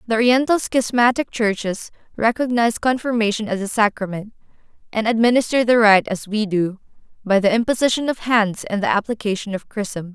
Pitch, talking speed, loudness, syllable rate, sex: 220 Hz, 155 wpm, -19 LUFS, 5.5 syllables/s, female